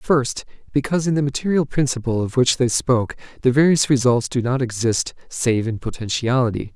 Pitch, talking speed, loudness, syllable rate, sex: 130 Hz, 170 wpm, -20 LUFS, 5.5 syllables/s, male